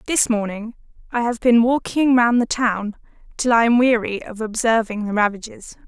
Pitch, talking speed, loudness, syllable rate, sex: 230 Hz, 175 wpm, -19 LUFS, 4.9 syllables/s, female